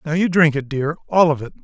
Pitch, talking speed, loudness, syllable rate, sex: 155 Hz, 295 wpm, -18 LUFS, 6.1 syllables/s, male